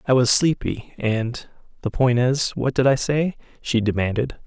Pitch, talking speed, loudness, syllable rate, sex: 125 Hz, 160 wpm, -21 LUFS, 4.4 syllables/s, male